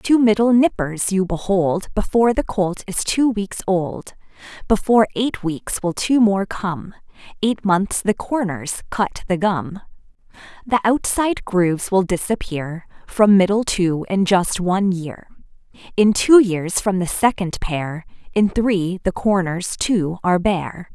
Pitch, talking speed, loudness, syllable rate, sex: 195 Hz, 150 wpm, -19 LUFS, 4.1 syllables/s, female